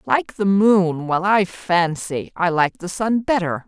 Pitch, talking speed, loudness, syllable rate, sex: 185 Hz, 165 wpm, -19 LUFS, 3.7 syllables/s, female